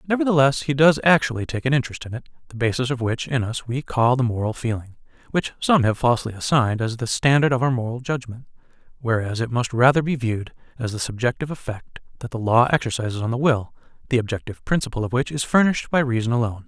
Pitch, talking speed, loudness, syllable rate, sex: 125 Hz, 210 wpm, -21 LUFS, 6.7 syllables/s, male